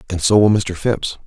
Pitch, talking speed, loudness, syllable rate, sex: 100 Hz, 235 wpm, -16 LUFS, 5.0 syllables/s, male